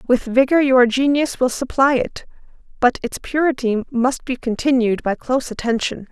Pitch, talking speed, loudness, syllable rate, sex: 250 Hz, 155 wpm, -18 LUFS, 5.2 syllables/s, female